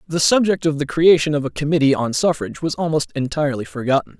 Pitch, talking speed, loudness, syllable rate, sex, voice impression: 150 Hz, 200 wpm, -18 LUFS, 6.5 syllables/s, male, masculine, adult-like, fluent, sincere, friendly